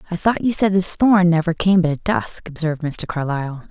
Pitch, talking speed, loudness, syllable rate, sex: 170 Hz, 225 wpm, -18 LUFS, 5.5 syllables/s, female